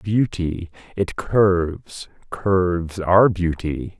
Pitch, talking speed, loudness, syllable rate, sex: 90 Hz, 90 wpm, -20 LUFS, 3.2 syllables/s, male